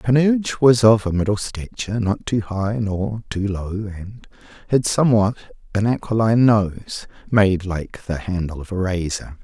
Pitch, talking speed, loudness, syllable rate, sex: 105 Hz, 160 wpm, -20 LUFS, 4.5 syllables/s, male